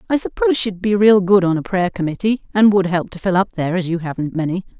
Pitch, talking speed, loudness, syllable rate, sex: 190 Hz, 265 wpm, -17 LUFS, 6.3 syllables/s, female